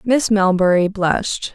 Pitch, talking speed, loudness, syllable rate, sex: 200 Hz, 115 wpm, -17 LUFS, 4.1 syllables/s, female